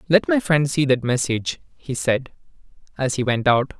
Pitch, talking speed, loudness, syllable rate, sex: 140 Hz, 190 wpm, -21 LUFS, 5.1 syllables/s, male